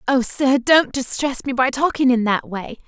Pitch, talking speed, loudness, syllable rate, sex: 260 Hz, 210 wpm, -18 LUFS, 4.6 syllables/s, female